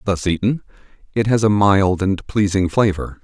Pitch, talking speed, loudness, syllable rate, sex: 100 Hz, 165 wpm, -18 LUFS, 4.6 syllables/s, male